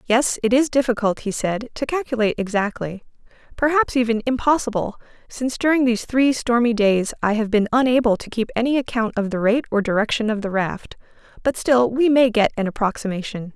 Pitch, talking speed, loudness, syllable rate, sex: 235 Hz, 180 wpm, -20 LUFS, 5.7 syllables/s, female